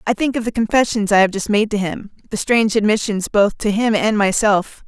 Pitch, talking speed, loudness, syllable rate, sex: 215 Hz, 235 wpm, -17 LUFS, 5.5 syllables/s, female